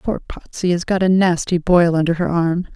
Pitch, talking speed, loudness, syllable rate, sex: 175 Hz, 220 wpm, -17 LUFS, 5.1 syllables/s, female